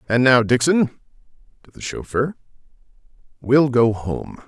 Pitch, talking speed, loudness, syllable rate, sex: 125 Hz, 120 wpm, -19 LUFS, 4.4 syllables/s, male